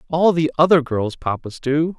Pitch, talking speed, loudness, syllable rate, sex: 150 Hz, 180 wpm, -19 LUFS, 4.6 syllables/s, male